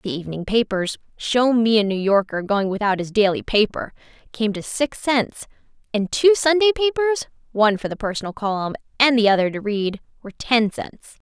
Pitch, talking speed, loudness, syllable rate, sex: 225 Hz, 160 wpm, -20 LUFS, 5.5 syllables/s, female